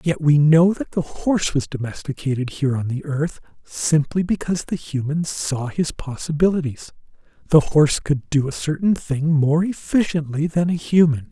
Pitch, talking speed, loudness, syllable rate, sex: 150 Hz, 170 wpm, -20 LUFS, 5.1 syllables/s, male